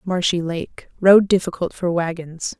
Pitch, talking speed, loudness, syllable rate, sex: 175 Hz, 115 wpm, -19 LUFS, 4.2 syllables/s, female